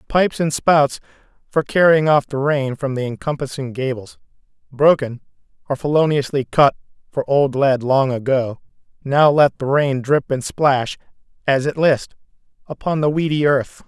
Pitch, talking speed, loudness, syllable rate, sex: 140 Hz, 150 wpm, -18 LUFS, 4.6 syllables/s, male